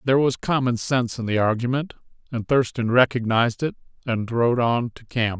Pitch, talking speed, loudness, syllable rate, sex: 120 Hz, 180 wpm, -22 LUFS, 5.4 syllables/s, male